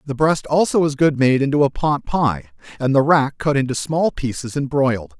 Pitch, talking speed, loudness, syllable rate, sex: 140 Hz, 220 wpm, -18 LUFS, 5.1 syllables/s, male